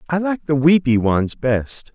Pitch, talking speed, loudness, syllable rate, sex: 145 Hz, 185 wpm, -18 LUFS, 4.0 syllables/s, male